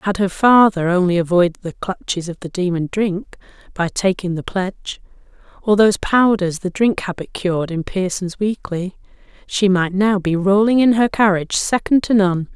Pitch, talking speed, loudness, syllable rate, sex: 190 Hz, 170 wpm, -17 LUFS, 4.9 syllables/s, female